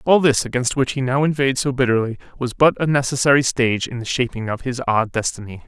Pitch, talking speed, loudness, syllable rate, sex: 130 Hz, 220 wpm, -19 LUFS, 6.2 syllables/s, male